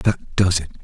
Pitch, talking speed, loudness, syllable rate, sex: 90 Hz, 215 wpm, -20 LUFS, 4.4 syllables/s, male